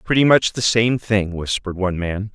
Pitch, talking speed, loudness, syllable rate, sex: 105 Hz, 205 wpm, -19 LUFS, 5.3 syllables/s, male